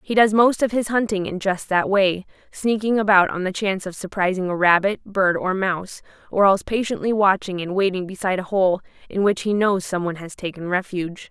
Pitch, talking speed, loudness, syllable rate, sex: 195 Hz, 210 wpm, -21 LUFS, 5.7 syllables/s, female